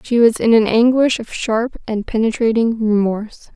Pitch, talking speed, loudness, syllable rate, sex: 225 Hz, 170 wpm, -16 LUFS, 4.9 syllables/s, female